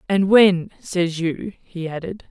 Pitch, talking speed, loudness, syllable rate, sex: 180 Hz, 155 wpm, -19 LUFS, 3.6 syllables/s, female